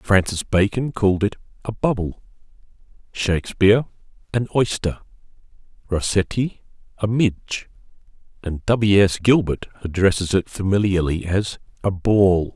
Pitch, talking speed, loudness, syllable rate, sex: 100 Hz, 105 wpm, -20 LUFS, 4.6 syllables/s, male